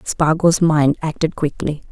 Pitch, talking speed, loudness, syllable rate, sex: 155 Hz, 125 wpm, -17 LUFS, 4.1 syllables/s, female